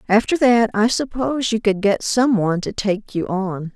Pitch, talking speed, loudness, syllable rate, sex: 215 Hz, 210 wpm, -19 LUFS, 4.8 syllables/s, female